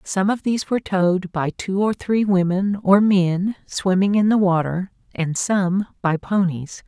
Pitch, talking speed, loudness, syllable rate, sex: 190 Hz, 175 wpm, -20 LUFS, 4.3 syllables/s, female